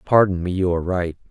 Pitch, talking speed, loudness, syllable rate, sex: 90 Hz, 230 wpm, -20 LUFS, 6.4 syllables/s, male